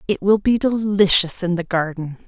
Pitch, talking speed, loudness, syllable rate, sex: 190 Hz, 185 wpm, -18 LUFS, 4.7 syllables/s, female